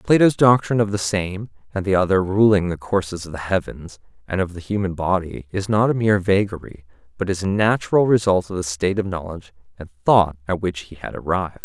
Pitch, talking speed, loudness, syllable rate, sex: 95 Hz, 210 wpm, -20 LUFS, 6.0 syllables/s, male